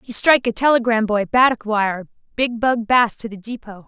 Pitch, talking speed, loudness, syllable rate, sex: 225 Hz, 185 wpm, -17 LUFS, 5.2 syllables/s, female